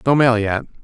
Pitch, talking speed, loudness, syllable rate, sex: 120 Hz, 215 wpm, -17 LUFS, 5.8 syllables/s, male